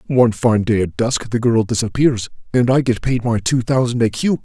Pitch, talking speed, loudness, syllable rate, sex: 120 Hz, 215 wpm, -17 LUFS, 5.0 syllables/s, male